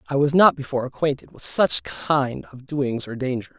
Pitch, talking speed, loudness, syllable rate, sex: 140 Hz, 200 wpm, -22 LUFS, 5.2 syllables/s, male